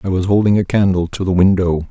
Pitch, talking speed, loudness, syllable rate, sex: 95 Hz, 250 wpm, -15 LUFS, 6.2 syllables/s, male